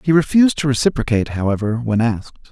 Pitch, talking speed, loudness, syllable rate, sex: 130 Hz, 165 wpm, -17 LUFS, 7.0 syllables/s, male